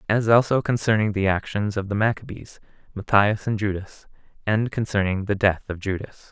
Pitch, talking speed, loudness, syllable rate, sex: 105 Hz, 160 wpm, -22 LUFS, 5.2 syllables/s, male